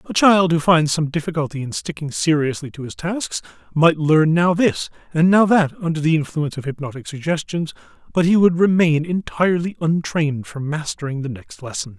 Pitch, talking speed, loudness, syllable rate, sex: 160 Hz, 180 wpm, -19 LUFS, 5.4 syllables/s, male